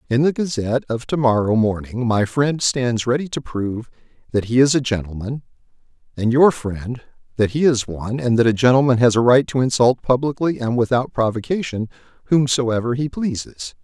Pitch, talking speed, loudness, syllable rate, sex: 125 Hz, 175 wpm, -19 LUFS, 5.3 syllables/s, male